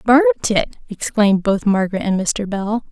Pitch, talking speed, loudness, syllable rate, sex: 205 Hz, 165 wpm, -17 LUFS, 4.6 syllables/s, female